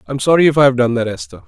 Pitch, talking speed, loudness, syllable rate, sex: 135 Hz, 285 wpm, -14 LUFS, 7.6 syllables/s, male